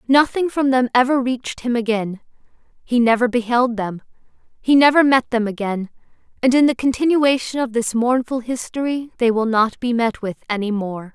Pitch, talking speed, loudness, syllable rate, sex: 240 Hz, 170 wpm, -18 LUFS, 5.2 syllables/s, female